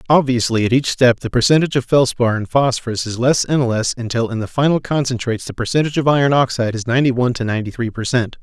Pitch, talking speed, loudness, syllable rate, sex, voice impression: 125 Hz, 230 wpm, -17 LUFS, 6.9 syllables/s, male, very masculine, young, adult-like, thick, slightly tensed, slightly weak, bright, hard, clear, fluent, slightly raspy, cool, very intellectual, refreshing, sincere, calm, mature, friendly, very reassuring, unique, elegant, very wild, sweet, kind, slightly modest